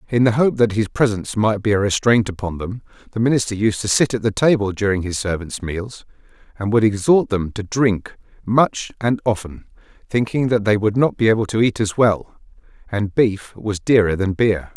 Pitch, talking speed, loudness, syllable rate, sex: 110 Hz, 205 wpm, -19 LUFS, 5.1 syllables/s, male